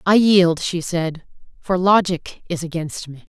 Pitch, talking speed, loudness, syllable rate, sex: 175 Hz, 160 wpm, -19 LUFS, 4.0 syllables/s, female